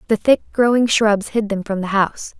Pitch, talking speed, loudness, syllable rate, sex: 215 Hz, 225 wpm, -17 LUFS, 5.3 syllables/s, female